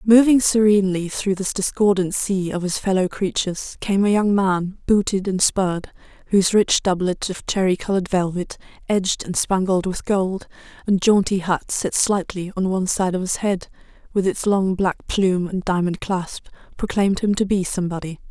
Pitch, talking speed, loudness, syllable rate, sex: 190 Hz, 175 wpm, -20 LUFS, 5.1 syllables/s, female